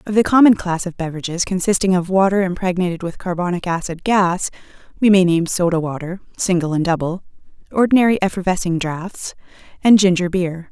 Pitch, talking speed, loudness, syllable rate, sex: 180 Hz, 155 wpm, -17 LUFS, 5.8 syllables/s, female